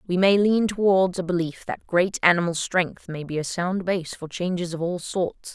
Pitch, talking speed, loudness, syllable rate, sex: 180 Hz, 215 wpm, -23 LUFS, 4.7 syllables/s, female